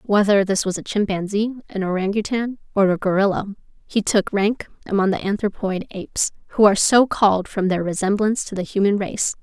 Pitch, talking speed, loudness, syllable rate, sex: 200 Hz, 180 wpm, -20 LUFS, 5.5 syllables/s, female